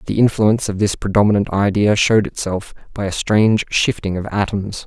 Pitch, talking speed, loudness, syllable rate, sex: 105 Hz, 175 wpm, -17 LUFS, 5.6 syllables/s, male